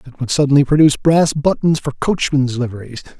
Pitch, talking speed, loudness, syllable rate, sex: 140 Hz, 190 wpm, -15 LUFS, 6.3 syllables/s, male